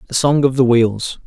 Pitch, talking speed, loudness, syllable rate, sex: 125 Hz, 235 wpm, -15 LUFS, 4.7 syllables/s, male